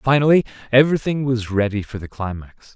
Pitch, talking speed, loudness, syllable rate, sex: 120 Hz, 150 wpm, -19 LUFS, 5.8 syllables/s, male